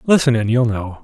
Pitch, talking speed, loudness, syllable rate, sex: 120 Hz, 230 wpm, -16 LUFS, 5.5 syllables/s, male